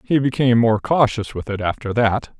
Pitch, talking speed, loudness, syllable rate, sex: 115 Hz, 200 wpm, -19 LUFS, 5.4 syllables/s, male